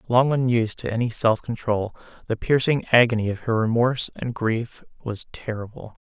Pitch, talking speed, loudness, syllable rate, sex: 115 Hz, 160 wpm, -23 LUFS, 5.2 syllables/s, male